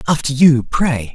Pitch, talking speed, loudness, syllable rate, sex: 140 Hz, 160 wpm, -15 LUFS, 4.0 syllables/s, male